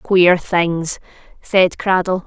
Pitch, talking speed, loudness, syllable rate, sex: 180 Hz, 105 wpm, -16 LUFS, 2.7 syllables/s, female